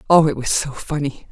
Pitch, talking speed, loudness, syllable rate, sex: 145 Hz, 230 wpm, -19 LUFS, 5.4 syllables/s, female